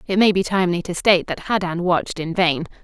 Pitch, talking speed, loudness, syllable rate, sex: 180 Hz, 235 wpm, -19 LUFS, 6.4 syllables/s, female